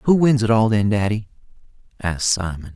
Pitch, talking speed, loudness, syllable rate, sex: 105 Hz, 175 wpm, -19 LUFS, 5.5 syllables/s, male